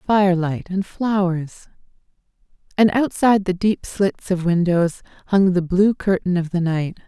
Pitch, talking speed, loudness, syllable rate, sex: 185 Hz, 145 wpm, -19 LUFS, 4.4 syllables/s, female